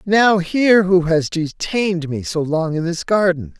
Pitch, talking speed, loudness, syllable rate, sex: 180 Hz, 185 wpm, -17 LUFS, 4.0 syllables/s, female